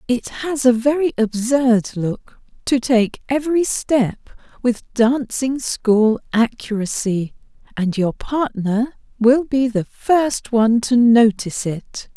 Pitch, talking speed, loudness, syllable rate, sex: 240 Hz, 125 wpm, -18 LUFS, 3.6 syllables/s, female